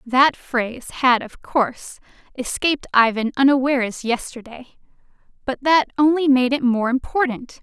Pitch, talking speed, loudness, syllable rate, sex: 260 Hz, 125 wpm, -19 LUFS, 4.6 syllables/s, female